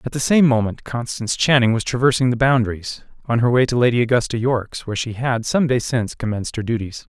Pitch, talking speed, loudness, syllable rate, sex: 120 Hz, 220 wpm, -19 LUFS, 6.3 syllables/s, male